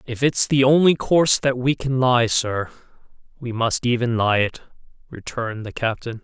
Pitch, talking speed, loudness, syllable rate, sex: 125 Hz, 175 wpm, -20 LUFS, 4.8 syllables/s, male